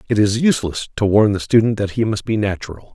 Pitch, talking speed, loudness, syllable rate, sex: 105 Hz, 245 wpm, -17 LUFS, 6.3 syllables/s, male